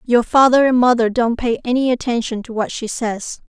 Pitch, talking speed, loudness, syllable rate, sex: 240 Hz, 205 wpm, -17 LUFS, 5.2 syllables/s, female